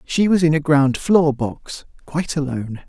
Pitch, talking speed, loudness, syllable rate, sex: 150 Hz, 190 wpm, -18 LUFS, 4.8 syllables/s, male